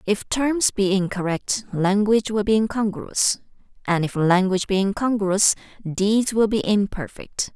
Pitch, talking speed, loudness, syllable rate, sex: 200 Hz, 135 wpm, -21 LUFS, 4.4 syllables/s, female